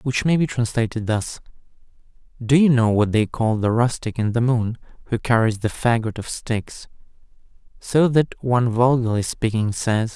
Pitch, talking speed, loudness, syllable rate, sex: 115 Hz, 165 wpm, -20 LUFS, 4.7 syllables/s, male